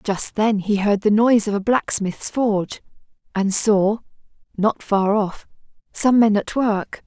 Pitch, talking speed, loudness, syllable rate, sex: 210 Hz, 160 wpm, -19 LUFS, 4.0 syllables/s, female